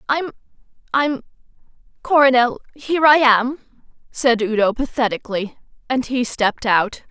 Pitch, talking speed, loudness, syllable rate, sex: 250 Hz, 95 wpm, -18 LUFS, 4.9 syllables/s, female